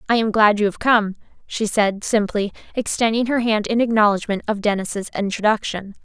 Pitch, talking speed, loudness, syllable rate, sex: 210 Hz, 170 wpm, -19 LUFS, 5.3 syllables/s, female